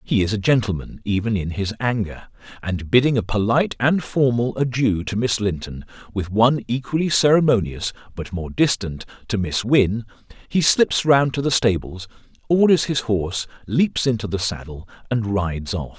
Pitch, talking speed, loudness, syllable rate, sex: 110 Hz, 165 wpm, -20 LUFS, 5.0 syllables/s, male